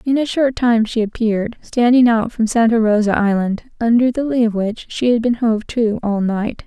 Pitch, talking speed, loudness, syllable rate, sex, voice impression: 230 Hz, 215 wpm, -17 LUFS, 4.9 syllables/s, female, very feminine, young, slightly adult-like, very thin, very relaxed, very weak, dark, very soft, clear, fluent, slightly raspy, very cute, very intellectual, refreshing, sincere, very calm, very friendly, very reassuring, unique, very elegant, sweet, very kind, very modest